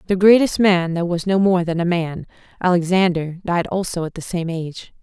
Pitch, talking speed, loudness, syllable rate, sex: 175 Hz, 205 wpm, -19 LUFS, 5.2 syllables/s, female